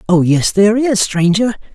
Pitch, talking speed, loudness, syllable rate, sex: 200 Hz, 170 wpm, -13 LUFS, 5.0 syllables/s, male